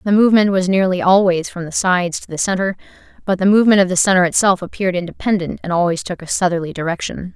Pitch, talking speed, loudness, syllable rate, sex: 185 Hz, 210 wpm, -16 LUFS, 6.9 syllables/s, female